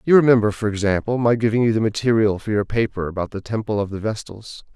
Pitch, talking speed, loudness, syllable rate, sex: 110 Hz, 225 wpm, -20 LUFS, 6.4 syllables/s, male